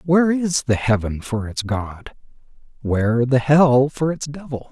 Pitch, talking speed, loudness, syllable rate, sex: 130 Hz, 165 wpm, -19 LUFS, 4.2 syllables/s, male